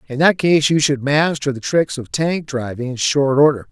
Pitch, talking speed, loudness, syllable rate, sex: 140 Hz, 225 wpm, -17 LUFS, 4.8 syllables/s, male